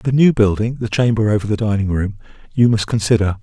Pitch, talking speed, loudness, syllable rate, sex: 110 Hz, 210 wpm, -17 LUFS, 6.0 syllables/s, male